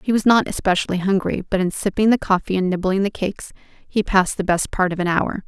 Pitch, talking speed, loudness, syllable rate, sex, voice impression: 195 Hz, 240 wpm, -20 LUFS, 6.2 syllables/s, female, feminine, slightly adult-like, slightly fluent, intellectual, calm